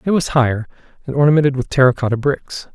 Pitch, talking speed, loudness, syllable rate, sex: 135 Hz, 195 wpm, -16 LUFS, 6.8 syllables/s, male